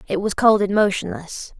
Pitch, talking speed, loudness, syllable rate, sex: 205 Hz, 190 wpm, -19 LUFS, 5.0 syllables/s, female